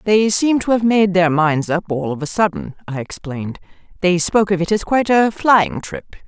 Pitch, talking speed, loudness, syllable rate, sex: 185 Hz, 220 wpm, -17 LUFS, 5.2 syllables/s, female